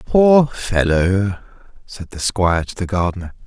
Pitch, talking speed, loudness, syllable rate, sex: 100 Hz, 140 wpm, -17 LUFS, 4.4 syllables/s, male